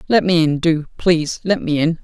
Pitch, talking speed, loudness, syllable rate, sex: 165 Hz, 235 wpm, -17 LUFS, 5.3 syllables/s, male